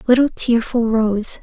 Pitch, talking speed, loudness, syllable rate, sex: 230 Hz, 125 wpm, -17 LUFS, 4.1 syllables/s, female